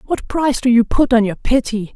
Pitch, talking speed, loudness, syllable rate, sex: 240 Hz, 245 wpm, -16 LUFS, 5.7 syllables/s, female